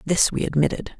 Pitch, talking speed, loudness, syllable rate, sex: 165 Hz, 180 wpm, -21 LUFS, 5.8 syllables/s, female